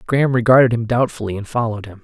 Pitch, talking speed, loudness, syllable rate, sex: 115 Hz, 205 wpm, -17 LUFS, 7.4 syllables/s, male